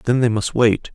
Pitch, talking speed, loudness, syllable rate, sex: 115 Hz, 255 wpm, -18 LUFS, 4.9 syllables/s, male